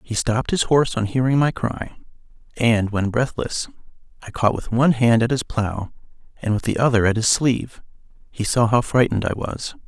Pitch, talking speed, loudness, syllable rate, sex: 115 Hz, 195 wpm, -20 LUFS, 5.4 syllables/s, male